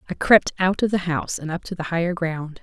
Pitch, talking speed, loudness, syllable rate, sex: 175 Hz, 275 wpm, -21 LUFS, 6.0 syllables/s, female